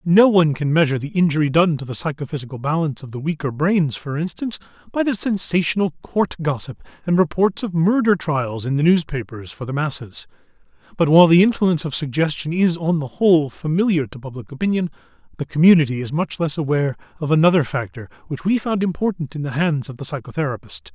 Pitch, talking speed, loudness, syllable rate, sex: 160 Hz, 190 wpm, -19 LUFS, 6.2 syllables/s, male